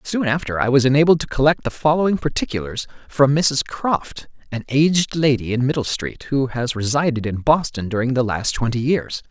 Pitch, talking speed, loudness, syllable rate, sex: 135 Hz, 185 wpm, -19 LUFS, 5.3 syllables/s, male